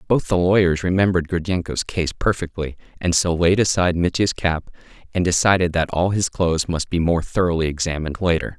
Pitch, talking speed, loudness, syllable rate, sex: 85 Hz, 175 wpm, -20 LUFS, 5.8 syllables/s, male